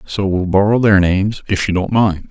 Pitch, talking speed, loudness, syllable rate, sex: 100 Hz, 235 wpm, -15 LUFS, 5.2 syllables/s, male